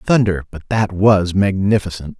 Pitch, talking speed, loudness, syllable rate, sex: 100 Hz, 135 wpm, -16 LUFS, 4.4 syllables/s, male